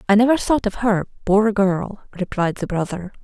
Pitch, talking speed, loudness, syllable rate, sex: 200 Hz, 185 wpm, -20 LUFS, 4.9 syllables/s, female